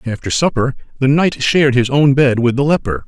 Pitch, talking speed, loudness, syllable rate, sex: 135 Hz, 215 wpm, -14 LUFS, 5.6 syllables/s, male